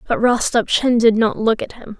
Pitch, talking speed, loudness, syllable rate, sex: 225 Hz, 210 wpm, -16 LUFS, 4.8 syllables/s, female